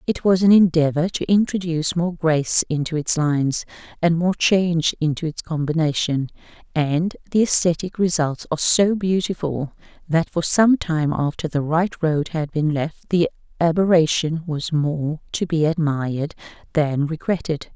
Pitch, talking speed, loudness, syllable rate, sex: 160 Hz, 150 wpm, -20 LUFS, 4.6 syllables/s, female